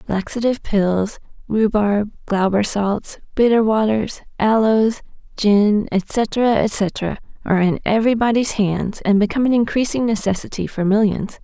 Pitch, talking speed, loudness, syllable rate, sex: 215 Hz, 120 wpm, -18 LUFS, 4.4 syllables/s, female